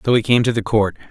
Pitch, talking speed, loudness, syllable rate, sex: 110 Hz, 325 wpm, -17 LUFS, 6.7 syllables/s, male